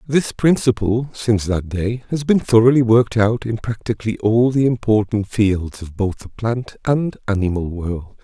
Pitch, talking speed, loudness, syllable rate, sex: 110 Hz, 170 wpm, -18 LUFS, 4.6 syllables/s, male